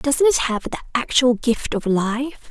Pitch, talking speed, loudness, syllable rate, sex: 250 Hz, 190 wpm, -20 LUFS, 3.9 syllables/s, female